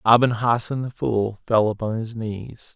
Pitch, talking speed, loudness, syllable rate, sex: 115 Hz, 175 wpm, -22 LUFS, 4.3 syllables/s, male